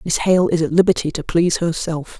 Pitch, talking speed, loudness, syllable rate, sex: 165 Hz, 220 wpm, -18 LUFS, 5.7 syllables/s, female